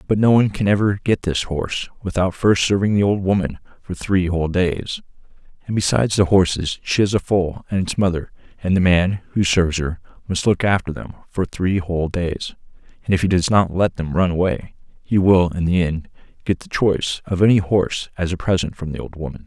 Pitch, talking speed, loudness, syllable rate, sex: 90 Hz, 215 wpm, -19 LUFS, 5.5 syllables/s, male